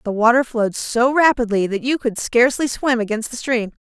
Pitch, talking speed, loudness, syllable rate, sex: 240 Hz, 205 wpm, -18 LUFS, 5.5 syllables/s, female